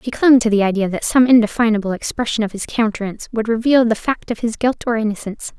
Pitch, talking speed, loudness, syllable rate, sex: 225 Hz, 225 wpm, -17 LUFS, 6.5 syllables/s, female